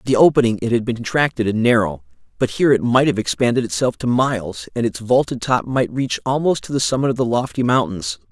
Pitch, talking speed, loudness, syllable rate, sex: 120 Hz, 230 wpm, -18 LUFS, 6.1 syllables/s, male